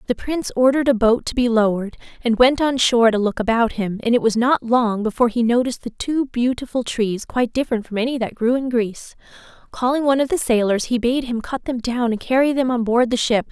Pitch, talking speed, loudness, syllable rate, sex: 240 Hz, 240 wpm, -19 LUFS, 6.1 syllables/s, female